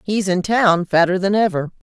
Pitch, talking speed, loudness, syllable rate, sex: 190 Hz, 190 wpm, -17 LUFS, 4.9 syllables/s, female